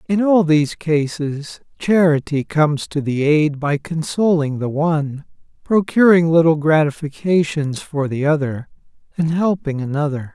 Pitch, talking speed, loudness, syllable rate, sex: 155 Hz, 130 wpm, -18 LUFS, 4.5 syllables/s, male